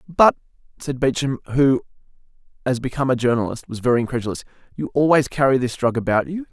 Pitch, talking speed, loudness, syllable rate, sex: 130 Hz, 165 wpm, -20 LUFS, 6.5 syllables/s, male